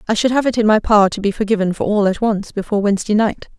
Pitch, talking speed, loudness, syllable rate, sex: 210 Hz, 285 wpm, -16 LUFS, 7.1 syllables/s, female